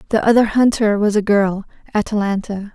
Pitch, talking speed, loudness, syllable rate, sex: 210 Hz, 155 wpm, -16 LUFS, 5.4 syllables/s, female